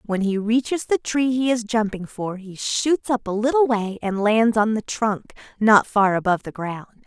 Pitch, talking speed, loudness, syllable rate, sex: 220 Hz, 210 wpm, -21 LUFS, 4.7 syllables/s, female